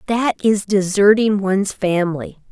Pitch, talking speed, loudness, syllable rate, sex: 200 Hz, 120 wpm, -17 LUFS, 4.7 syllables/s, female